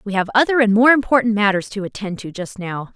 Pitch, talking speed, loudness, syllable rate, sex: 215 Hz, 245 wpm, -17 LUFS, 6.1 syllables/s, female